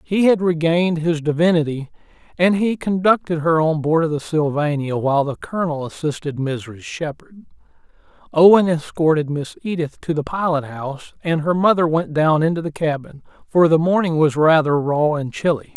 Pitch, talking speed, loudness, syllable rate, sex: 160 Hz, 170 wpm, -19 LUFS, 5.1 syllables/s, male